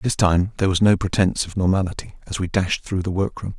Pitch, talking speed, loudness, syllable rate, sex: 95 Hz, 235 wpm, -21 LUFS, 6.2 syllables/s, male